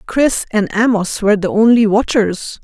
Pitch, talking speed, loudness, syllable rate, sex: 215 Hz, 160 wpm, -14 LUFS, 4.6 syllables/s, female